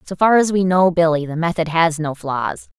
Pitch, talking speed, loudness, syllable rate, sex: 170 Hz, 235 wpm, -17 LUFS, 5.0 syllables/s, female